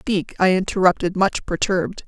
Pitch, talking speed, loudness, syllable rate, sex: 185 Hz, 145 wpm, -20 LUFS, 5.0 syllables/s, female